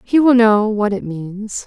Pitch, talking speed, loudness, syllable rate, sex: 215 Hz, 215 wpm, -15 LUFS, 3.8 syllables/s, female